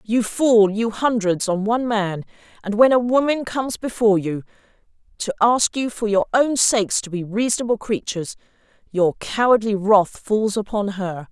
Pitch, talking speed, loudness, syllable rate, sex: 215 Hz, 155 wpm, -20 LUFS, 4.9 syllables/s, female